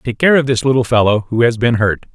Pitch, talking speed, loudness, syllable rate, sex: 120 Hz, 280 wpm, -14 LUFS, 6.0 syllables/s, male